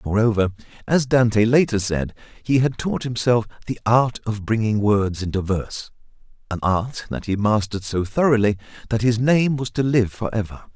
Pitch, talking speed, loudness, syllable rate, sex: 110 Hz, 160 wpm, -21 LUFS, 5.0 syllables/s, male